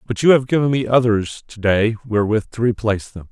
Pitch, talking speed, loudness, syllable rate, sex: 115 Hz, 215 wpm, -18 LUFS, 6.1 syllables/s, male